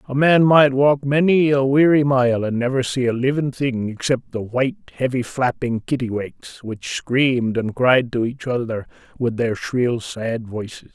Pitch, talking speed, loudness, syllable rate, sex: 125 Hz, 175 wpm, -19 LUFS, 4.6 syllables/s, male